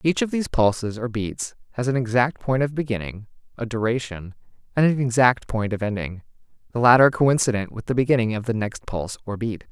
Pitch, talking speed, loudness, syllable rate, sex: 120 Hz, 200 wpm, -22 LUFS, 5.8 syllables/s, male